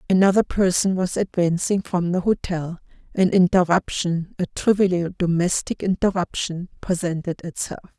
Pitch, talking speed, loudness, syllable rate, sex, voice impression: 180 Hz, 115 wpm, -21 LUFS, 4.7 syllables/s, female, feminine, adult-like, slightly weak, slightly halting, calm, reassuring, modest